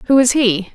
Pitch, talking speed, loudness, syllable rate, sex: 235 Hz, 240 wpm, -14 LUFS, 4.2 syllables/s, female